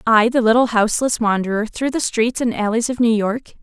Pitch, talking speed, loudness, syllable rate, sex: 230 Hz, 215 wpm, -18 LUFS, 5.5 syllables/s, female